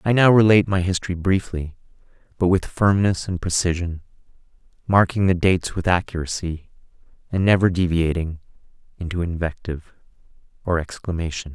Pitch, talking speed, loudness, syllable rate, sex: 90 Hz, 120 wpm, -21 LUFS, 5.7 syllables/s, male